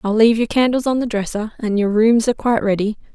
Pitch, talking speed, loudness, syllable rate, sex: 225 Hz, 250 wpm, -17 LUFS, 6.7 syllables/s, female